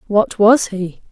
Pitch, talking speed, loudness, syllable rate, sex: 205 Hz, 160 wpm, -14 LUFS, 3.5 syllables/s, female